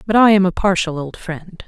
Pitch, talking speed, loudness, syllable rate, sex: 180 Hz, 250 wpm, -16 LUFS, 5.2 syllables/s, female